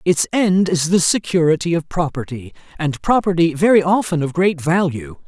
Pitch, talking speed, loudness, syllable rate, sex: 165 Hz, 160 wpm, -17 LUFS, 5.0 syllables/s, male